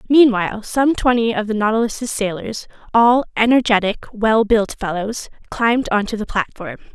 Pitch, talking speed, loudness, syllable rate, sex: 225 Hz, 120 wpm, -17 LUFS, 4.9 syllables/s, female